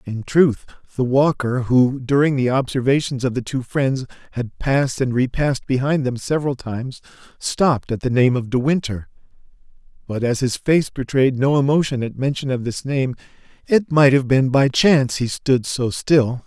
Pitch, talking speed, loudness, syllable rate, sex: 130 Hz, 180 wpm, -19 LUFS, 4.9 syllables/s, male